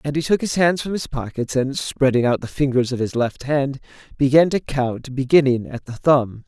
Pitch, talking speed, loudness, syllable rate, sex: 135 Hz, 225 wpm, -20 LUFS, 5.0 syllables/s, male